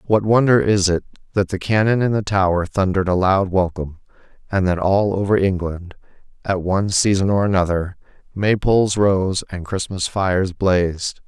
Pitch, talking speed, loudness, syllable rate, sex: 95 Hz, 160 wpm, -18 LUFS, 5.1 syllables/s, male